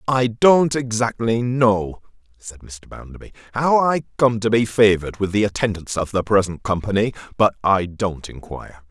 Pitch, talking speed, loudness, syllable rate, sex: 110 Hz, 160 wpm, -19 LUFS, 5.0 syllables/s, male